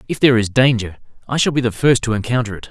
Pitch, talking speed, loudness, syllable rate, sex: 120 Hz, 265 wpm, -17 LUFS, 7.1 syllables/s, male